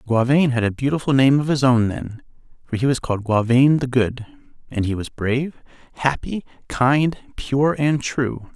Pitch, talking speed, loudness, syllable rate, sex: 130 Hz, 175 wpm, -20 LUFS, 4.6 syllables/s, male